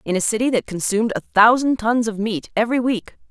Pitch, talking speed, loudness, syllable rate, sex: 220 Hz, 220 wpm, -19 LUFS, 5.9 syllables/s, female